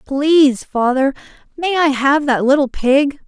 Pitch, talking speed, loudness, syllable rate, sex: 280 Hz, 145 wpm, -15 LUFS, 4.2 syllables/s, female